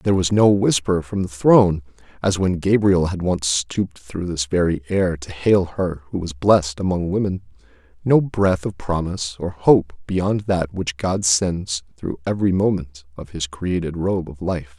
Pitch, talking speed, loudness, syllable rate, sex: 90 Hz, 185 wpm, -20 LUFS, 4.6 syllables/s, male